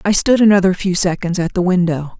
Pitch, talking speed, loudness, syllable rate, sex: 185 Hz, 220 wpm, -15 LUFS, 5.9 syllables/s, female